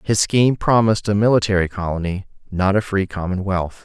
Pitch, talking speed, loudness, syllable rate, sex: 100 Hz, 155 wpm, -18 LUFS, 5.7 syllables/s, male